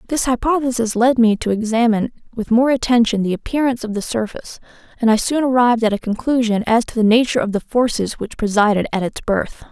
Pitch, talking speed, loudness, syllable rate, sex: 230 Hz, 205 wpm, -17 LUFS, 6.3 syllables/s, female